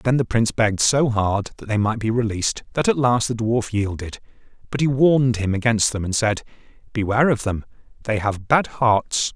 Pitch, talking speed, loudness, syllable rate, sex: 115 Hz, 205 wpm, -20 LUFS, 5.4 syllables/s, male